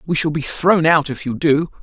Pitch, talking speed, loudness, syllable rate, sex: 155 Hz, 265 wpm, -17 LUFS, 5.0 syllables/s, male